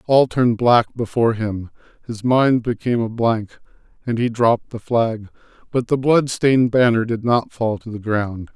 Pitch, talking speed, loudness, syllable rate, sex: 115 Hz, 180 wpm, -19 LUFS, 4.7 syllables/s, male